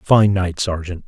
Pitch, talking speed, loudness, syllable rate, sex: 90 Hz, 170 wpm, -18 LUFS, 4.1 syllables/s, male